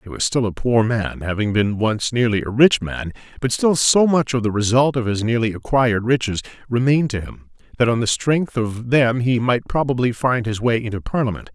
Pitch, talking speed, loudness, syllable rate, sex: 120 Hz, 220 wpm, -19 LUFS, 5.3 syllables/s, male